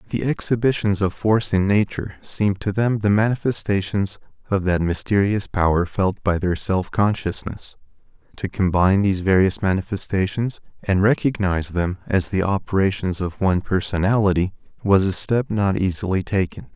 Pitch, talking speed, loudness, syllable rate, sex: 95 Hz, 145 wpm, -21 LUFS, 5.2 syllables/s, male